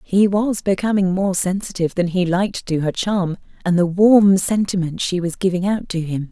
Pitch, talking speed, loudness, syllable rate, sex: 185 Hz, 200 wpm, -18 LUFS, 5.0 syllables/s, female